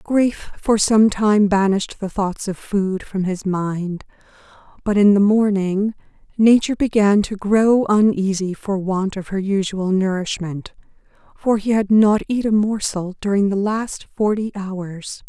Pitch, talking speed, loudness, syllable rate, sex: 200 Hz, 155 wpm, -19 LUFS, 4.1 syllables/s, female